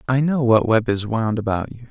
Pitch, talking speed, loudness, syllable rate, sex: 115 Hz, 250 wpm, -19 LUFS, 5.2 syllables/s, male